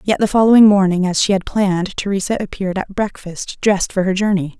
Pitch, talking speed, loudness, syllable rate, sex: 195 Hz, 210 wpm, -16 LUFS, 6.1 syllables/s, female